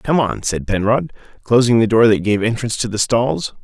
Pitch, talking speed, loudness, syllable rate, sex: 115 Hz, 215 wpm, -16 LUFS, 5.3 syllables/s, male